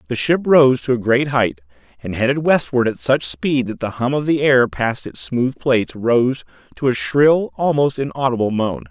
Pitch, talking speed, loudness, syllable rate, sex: 125 Hz, 200 wpm, -17 LUFS, 4.7 syllables/s, male